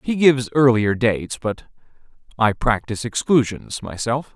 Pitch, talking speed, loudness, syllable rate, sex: 120 Hz, 125 wpm, -20 LUFS, 4.9 syllables/s, male